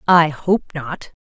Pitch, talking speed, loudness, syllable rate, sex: 160 Hz, 145 wpm, -18 LUFS, 3.4 syllables/s, female